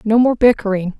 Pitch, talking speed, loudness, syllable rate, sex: 215 Hz, 180 wpm, -15 LUFS, 5.7 syllables/s, female